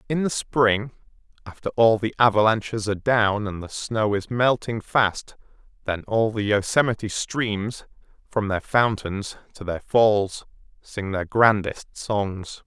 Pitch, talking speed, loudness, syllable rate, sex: 105 Hz, 140 wpm, -23 LUFS, 3.9 syllables/s, male